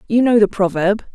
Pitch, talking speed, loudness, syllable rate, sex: 205 Hz, 210 wpm, -16 LUFS, 5.4 syllables/s, female